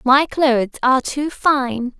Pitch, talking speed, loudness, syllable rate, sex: 265 Hz, 150 wpm, -17 LUFS, 3.8 syllables/s, female